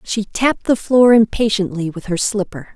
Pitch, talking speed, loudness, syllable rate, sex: 210 Hz, 175 wpm, -16 LUFS, 4.9 syllables/s, female